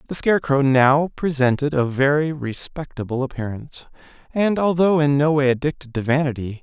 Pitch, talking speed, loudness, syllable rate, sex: 140 Hz, 155 wpm, -20 LUFS, 5.6 syllables/s, male